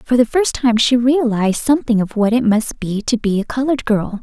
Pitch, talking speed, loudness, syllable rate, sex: 235 Hz, 240 wpm, -16 LUFS, 5.5 syllables/s, female